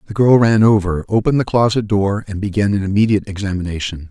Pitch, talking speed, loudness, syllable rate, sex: 100 Hz, 190 wpm, -16 LUFS, 6.5 syllables/s, male